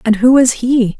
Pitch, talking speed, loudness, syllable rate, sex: 240 Hz, 240 wpm, -11 LUFS, 4.5 syllables/s, female